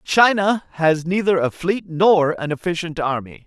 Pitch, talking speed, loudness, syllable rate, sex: 170 Hz, 155 wpm, -19 LUFS, 4.4 syllables/s, male